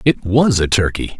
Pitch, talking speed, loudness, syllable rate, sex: 110 Hz, 200 wpm, -15 LUFS, 4.6 syllables/s, male